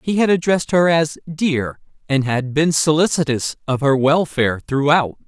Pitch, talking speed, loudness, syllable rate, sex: 150 Hz, 160 wpm, -17 LUFS, 4.9 syllables/s, male